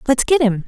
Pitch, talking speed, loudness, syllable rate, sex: 255 Hz, 265 wpm, -16 LUFS, 5.9 syllables/s, female